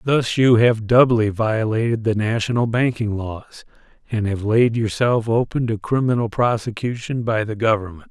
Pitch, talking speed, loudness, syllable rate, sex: 115 Hz, 150 wpm, -19 LUFS, 4.7 syllables/s, male